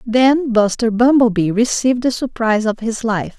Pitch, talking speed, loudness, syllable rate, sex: 230 Hz, 160 wpm, -16 LUFS, 4.9 syllables/s, female